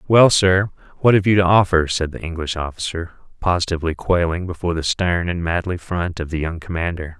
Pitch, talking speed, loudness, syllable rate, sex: 85 Hz, 190 wpm, -19 LUFS, 5.7 syllables/s, male